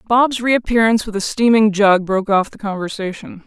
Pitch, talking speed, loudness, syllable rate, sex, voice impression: 210 Hz, 175 wpm, -16 LUFS, 5.4 syllables/s, female, very feminine, slightly adult-like, thin, tensed, powerful, slightly dark, slightly hard, clear, fluent, cute, slightly cool, intellectual, refreshing, very sincere, calm, friendly, slightly reassuring, very unique, slightly elegant, wild, slightly sweet, lively, strict, slightly intense